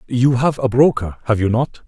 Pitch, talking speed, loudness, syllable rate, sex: 120 Hz, 225 wpm, -17 LUFS, 5.1 syllables/s, male